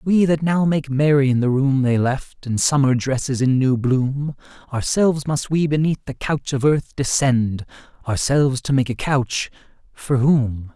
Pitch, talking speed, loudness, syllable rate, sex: 135 Hz, 180 wpm, -19 LUFS, 4.5 syllables/s, male